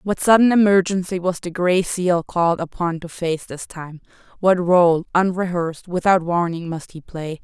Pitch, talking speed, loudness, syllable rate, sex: 175 Hz, 160 wpm, -19 LUFS, 4.6 syllables/s, female